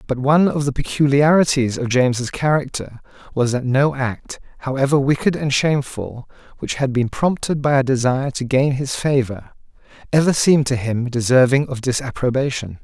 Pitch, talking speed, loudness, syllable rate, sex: 135 Hz, 160 wpm, -18 LUFS, 5.3 syllables/s, male